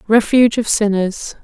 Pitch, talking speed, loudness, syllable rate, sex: 210 Hz, 125 wpm, -15 LUFS, 4.8 syllables/s, female